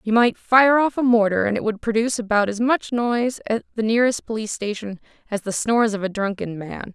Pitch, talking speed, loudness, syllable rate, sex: 220 Hz, 225 wpm, -21 LUFS, 6.0 syllables/s, female